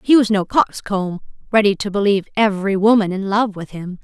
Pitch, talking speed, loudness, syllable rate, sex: 200 Hz, 195 wpm, -17 LUFS, 5.7 syllables/s, female